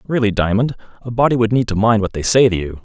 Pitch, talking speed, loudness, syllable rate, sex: 110 Hz, 275 wpm, -16 LUFS, 6.6 syllables/s, male